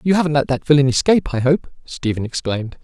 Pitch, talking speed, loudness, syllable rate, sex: 140 Hz, 210 wpm, -18 LUFS, 6.5 syllables/s, male